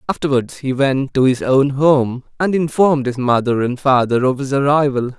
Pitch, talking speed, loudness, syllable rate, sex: 135 Hz, 185 wpm, -16 LUFS, 5.0 syllables/s, male